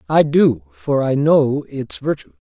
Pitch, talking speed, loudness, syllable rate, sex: 135 Hz, 170 wpm, -18 LUFS, 3.9 syllables/s, male